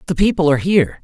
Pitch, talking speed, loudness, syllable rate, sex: 160 Hz, 235 wpm, -15 LUFS, 8.4 syllables/s, male